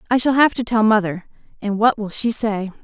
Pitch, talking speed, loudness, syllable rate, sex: 220 Hz, 235 wpm, -18 LUFS, 5.4 syllables/s, female